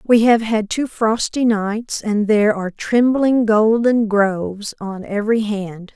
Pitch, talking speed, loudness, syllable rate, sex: 215 Hz, 150 wpm, -17 LUFS, 4.0 syllables/s, female